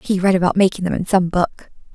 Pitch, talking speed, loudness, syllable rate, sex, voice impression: 185 Hz, 245 wpm, -18 LUFS, 6.1 syllables/s, female, feminine, slightly adult-like, cute, refreshing, friendly, slightly kind